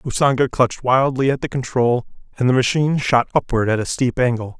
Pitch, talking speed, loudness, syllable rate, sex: 125 Hz, 195 wpm, -18 LUFS, 5.9 syllables/s, male